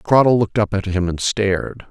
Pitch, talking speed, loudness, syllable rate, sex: 100 Hz, 220 wpm, -18 LUFS, 5.4 syllables/s, male